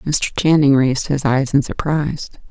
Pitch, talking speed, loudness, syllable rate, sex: 140 Hz, 170 wpm, -17 LUFS, 4.9 syllables/s, female